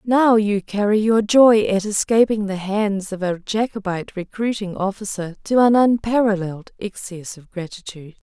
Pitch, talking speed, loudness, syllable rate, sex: 205 Hz, 145 wpm, -19 LUFS, 4.8 syllables/s, female